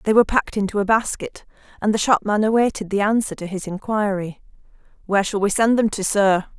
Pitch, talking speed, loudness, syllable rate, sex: 205 Hz, 200 wpm, -20 LUFS, 6.1 syllables/s, female